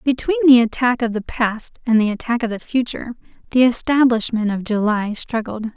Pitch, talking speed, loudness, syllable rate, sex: 230 Hz, 175 wpm, -18 LUFS, 5.2 syllables/s, female